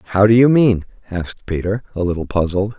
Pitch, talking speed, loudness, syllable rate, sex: 100 Hz, 195 wpm, -17 LUFS, 6.3 syllables/s, male